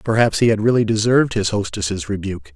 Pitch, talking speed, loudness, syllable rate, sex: 105 Hz, 190 wpm, -18 LUFS, 6.1 syllables/s, male